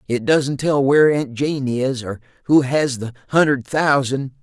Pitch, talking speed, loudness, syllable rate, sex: 135 Hz, 175 wpm, -18 LUFS, 4.3 syllables/s, male